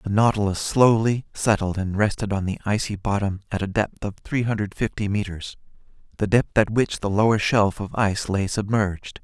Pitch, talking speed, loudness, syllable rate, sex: 105 Hz, 190 wpm, -23 LUFS, 5.2 syllables/s, male